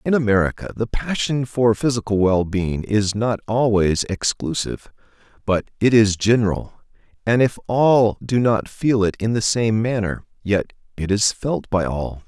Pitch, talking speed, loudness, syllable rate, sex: 110 Hz, 155 wpm, -20 LUFS, 4.5 syllables/s, male